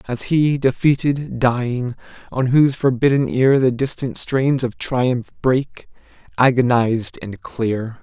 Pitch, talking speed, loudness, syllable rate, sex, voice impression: 130 Hz, 125 wpm, -18 LUFS, 3.9 syllables/s, male, very masculine, adult-like, slightly thick, slightly relaxed, slightly weak, slightly dark, soft, clear, slightly halting, slightly raspy, cool, intellectual, slightly refreshing, sincere, calm, friendly, reassuring, slightly unique, elegant, slightly wild, slightly sweet, lively, kind, slightly intense